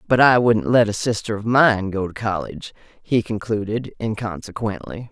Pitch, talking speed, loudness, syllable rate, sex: 110 Hz, 165 wpm, -20 LUFS, 4.9 syllables/s, female